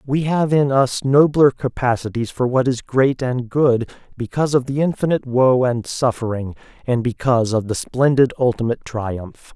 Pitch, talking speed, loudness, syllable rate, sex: 125 Hz, 165 wpm, -18 LUFS, 4.9 syllables/s, male